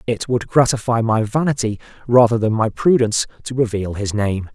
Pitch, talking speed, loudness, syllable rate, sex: 115 Hz, 170 wpm, -18 LUFS, 5.3 syllables/s, male